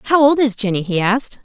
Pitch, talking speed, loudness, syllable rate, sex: 230 Hz, 250 wpm, -16 LUFS, 5.8 syllables/s, female